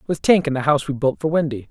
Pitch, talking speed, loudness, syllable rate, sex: 140 Hz, 315 wpm, -19 LUFS, 7.1 syllables/s, male